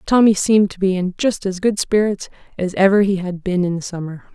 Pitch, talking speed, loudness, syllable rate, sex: 190 Hz, 220 wpm, -18 LUFS, 5.4 syllables/s, female